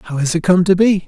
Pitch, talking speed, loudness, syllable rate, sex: 175 Hz, 335 wpm, -14 LUFS, 5.8 syllables/s, male